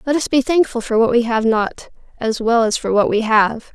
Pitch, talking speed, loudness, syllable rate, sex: 235 Hz, 255 wpm, -17 LUFS, 5.2 syllables/s, female